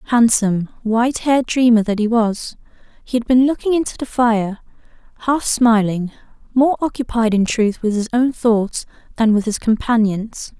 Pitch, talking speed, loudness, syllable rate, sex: 230 Hz, 155 wpm, -17 LUFS, 4.8 syllables/s, female